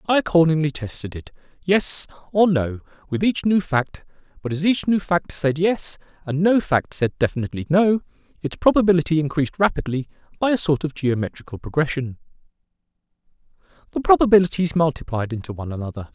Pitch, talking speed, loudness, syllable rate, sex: 160 Hz, 150 wpm, -21 LUFS, 5.9 syllables/s, male